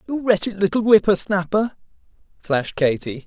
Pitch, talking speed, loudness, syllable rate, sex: 190 Hz, 130 wpm, -20 LUFS, 5.3 syllables/s, male